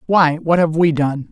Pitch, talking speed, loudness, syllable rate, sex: 160 Hz, 225 wpm, -16 LUFS, 4.5 syllables/s, male